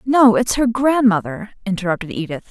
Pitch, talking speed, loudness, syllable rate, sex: 215 Hz, 145 wpm, -17 LUFS, 5.4 syllables/s, female